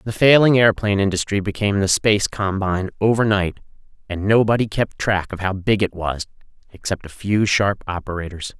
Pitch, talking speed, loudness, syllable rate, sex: 100 Hz, 160 wpm, -19 LUFS, 5.5 syllables/s, male